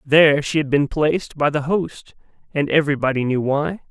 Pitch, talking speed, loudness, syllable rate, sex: 150 Hz, 185 wpm, -19 LUFS, 5.4 syllables/s, male